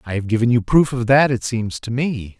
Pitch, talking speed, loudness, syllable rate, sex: 120 Hz, 275 wpm, -18 LUFS, 5.2 syllables/s, male